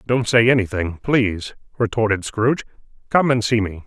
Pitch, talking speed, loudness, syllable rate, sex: 110 Hz, 155 wpm, -19 LUFS, 5.4 syllables/s, male